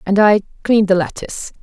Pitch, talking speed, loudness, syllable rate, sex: 200 Hz, 145 wpm, -15 LUFS, 6.6 syllables/s, female